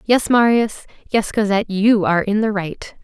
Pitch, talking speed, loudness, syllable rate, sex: 210 Hz, 180 wpm, -17 LUFS, 4.9 syllables/s, female